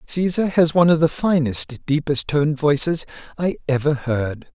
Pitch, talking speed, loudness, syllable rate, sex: 150 Hz, 155 wpm, -20 LUFS, 4.8 syllables/s, male